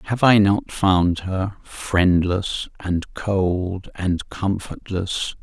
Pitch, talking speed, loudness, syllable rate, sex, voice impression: 95 Hz, 110 wpm, -21 LUFS, 2.7 syllables/s, male, masculine, middle-aged, tensed, powerful, hard, clear, halting, cool, calm, mature, wild, slightly lively, slightly strict